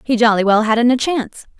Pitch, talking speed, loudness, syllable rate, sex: 230 Hz, 225 wpm, -15 LUFS, 5.7 syllables/s, female